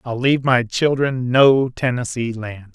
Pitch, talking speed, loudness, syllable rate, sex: 125 Hz, 155 wpm, -18 LUFS, 4.2 syllables/s, male